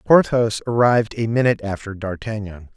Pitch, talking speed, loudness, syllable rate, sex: 110 Hz, 130 wpm, -20 LUFS, 5.5 syllables/s, male